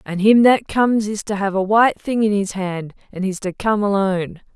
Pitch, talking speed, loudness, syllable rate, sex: 205 Hz, 235 wpm, -18 LUFS, 5.3 syllables/s, female